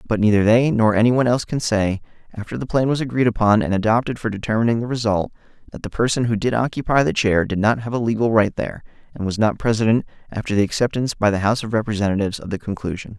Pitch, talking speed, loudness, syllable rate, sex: 110 Hz, 230 wpm, -19 LUFS, 7.0 syllables/s, male